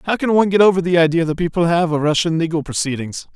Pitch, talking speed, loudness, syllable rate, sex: 165 Hz, 250 wpm, -17 LUFS, 6.9 syllables/s, male